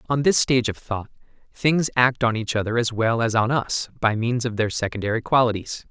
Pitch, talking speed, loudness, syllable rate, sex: 120 Hz, 215 wpm, -22 LUFS, 5.4 syllables/s, male